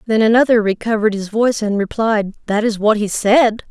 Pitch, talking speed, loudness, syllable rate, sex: 215 Hz, 195 wpm, -16 LUFS, 5.6 syllables/s, female